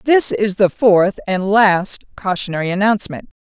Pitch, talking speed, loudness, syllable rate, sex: 205 Hz, 140 wpm, -16 LUFS, 4.7 syllables/s, female